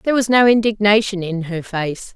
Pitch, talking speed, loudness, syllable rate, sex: 200 Hz, 195 wpm, -17 LUFS, 5.2 syllables/s, female